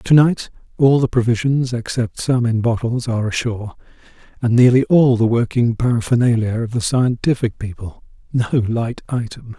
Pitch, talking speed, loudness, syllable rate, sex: 120 Hz, 145 wpm, -17 LUFS, 5.0 syllables/s, male